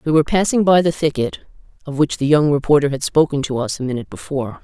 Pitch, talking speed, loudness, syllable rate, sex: 145 Hz, 235 wpm, -17 LUFS, 6.8 syllables/s, female